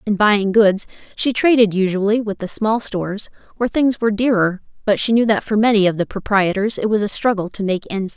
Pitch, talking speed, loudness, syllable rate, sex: 210 Hz, 230 wpm, -17 LUFS, 5.8 syllables/s, female